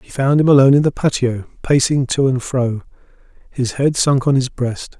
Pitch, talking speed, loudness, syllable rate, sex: 130 Hz, 205 wpm, -16 LUFS, 5.1 syllables/s, male